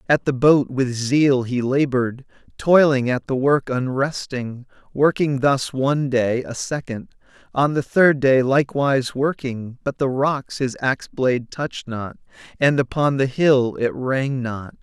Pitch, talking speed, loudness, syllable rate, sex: 135 Hz, 160 wpm, -20 LUFS, 4.2 syllables/s, male